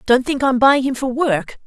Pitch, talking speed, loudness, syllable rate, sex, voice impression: 255 Hz, 250 wpm, -17 LUFS, 4.6 syllables/s, female, feminine, adult-like, slightly clear, slightly intellectual, slightly elegant